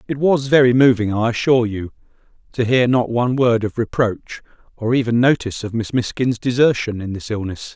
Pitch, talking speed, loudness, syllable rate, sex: 120 Hz, 180 wpm, -18 LUFS, 5.6 syllables/s, male